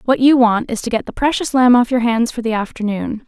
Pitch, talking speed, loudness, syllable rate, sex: 240 Hz, 275 wpm, -16 LUFS, 5.8 syllables/s, female